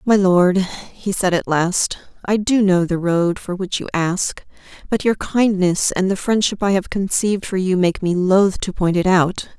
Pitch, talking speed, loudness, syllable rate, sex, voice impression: 190 Hz, 205 wpm, -18 LUFS, 4.2 syllables/s, female, very feminine, slightly adult-like, thin, tensed, powerful, very bright, soft, very clear, very fluent, slightly raspy, cute, very intellectual, very refreshing, sincere, slightly calm, very friendly, very reassuring, unique, slightly elegant, wild, sweet, very lively, kind, slightly intense, light